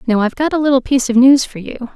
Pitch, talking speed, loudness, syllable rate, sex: 255 Hz, 305 wpm, -13 LUFS, 7.2 syllables/s, female